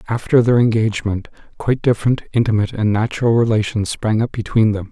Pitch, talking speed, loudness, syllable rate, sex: 110 Hz, 160 wpm, -17 LUFS, 6.4 syllables/s, male